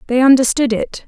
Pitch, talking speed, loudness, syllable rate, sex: 255 Hz, 170 wpm, -14 LUFS, 5.6 syllables/s, female